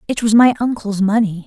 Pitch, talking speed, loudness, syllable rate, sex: 220 Hz, 205 wpm, -15 LUFS, 5.6 syllables/s, female